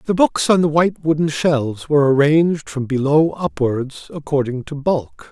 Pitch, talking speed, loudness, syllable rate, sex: 150 Hz, 170 wpm, -17 LUFS, 4.9 syllables/s, male